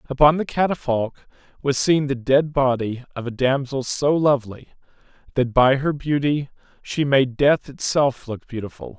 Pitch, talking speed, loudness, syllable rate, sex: 135 Hz, 155 wpm, -21 LUFS, 4.7 syllables/s, male